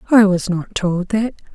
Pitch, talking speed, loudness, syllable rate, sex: 200 Hz, 195 wpm, -18 LUFS, 4.4 syllables/s, female